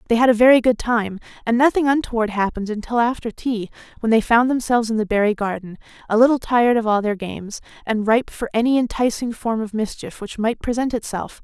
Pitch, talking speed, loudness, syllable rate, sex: 230 Hz, 210 wpm, -19 LUFS, 6.1 syllables/s, female